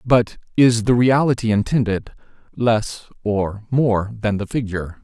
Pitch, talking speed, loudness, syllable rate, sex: 110 Hz, 130 wpm, -19 LUFS, 4.2 syllables/s, male